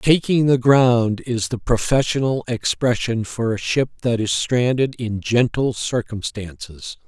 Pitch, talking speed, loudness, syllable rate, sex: 120 Hz, 135 wpm, -19 LUFS, 4.0 syllables/s, male